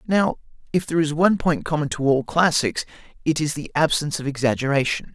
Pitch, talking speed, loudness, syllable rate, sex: 150 Hz, 185 wpm, -21 LUFS, 6.2 syllables/s, male